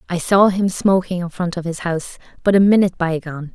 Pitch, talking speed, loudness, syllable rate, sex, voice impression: 180 Hz, 235 wpm, -18 LUFS, 5.8 syllables/s, female, very feminine, slightly adult-like, slightly thin, tensed, slightly weak, slightly bright, slightly soft, clear, fluent, cute, intellectual, slightly refreshing, sincere, very calm, friendly, very reassuring, unique, very elegant, wild, sweet, lively, kind, slightly modest, slightly light